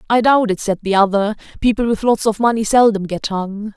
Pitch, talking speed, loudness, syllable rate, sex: 215 Hz, 225 wpm, -16 LUFS, 5.5 syllables/s, female